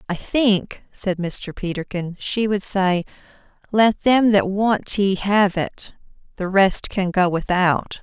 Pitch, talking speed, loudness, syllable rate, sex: 195 Hz, 150 wpm, -20 LUFS, 3.5 syllables/s, female